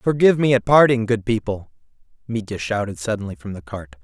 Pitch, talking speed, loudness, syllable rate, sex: 110 Hz, 180 wpm, -20 LUFS, 5.9 syllables/s, male